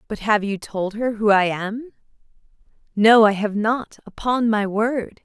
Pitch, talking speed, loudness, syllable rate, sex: 215 Hz, 170 wpm, -20 LUFS, 4.0 syllables/s, female